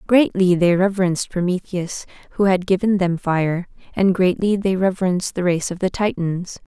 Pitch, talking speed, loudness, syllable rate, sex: 185 Hz, 160 wpm, -19 LUFS, 5.1 syllables/s, female